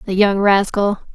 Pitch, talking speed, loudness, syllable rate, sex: 200 Hz, 155 wpm, -16 LUFS, 4.4 syllables/s, female